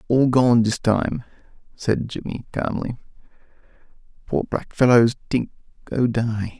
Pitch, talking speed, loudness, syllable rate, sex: 120 Hz, 120 wpm, -21 LUFS, 4.0 syllables/s, male